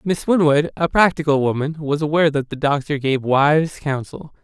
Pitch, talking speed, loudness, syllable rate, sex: 150 Hz, 175 wpm, -18 LUFS, 5.0 syllables/s, male